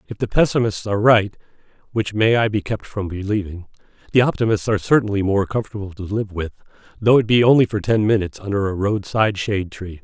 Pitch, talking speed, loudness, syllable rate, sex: 105 Hz, 185 wpm, -19 LUFS, 6.4 syllables/s, male